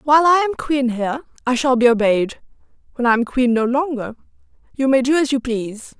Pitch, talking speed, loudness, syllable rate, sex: 255 Hz, 210 wpm, -18 LUFS, 5.8 syllables/s, female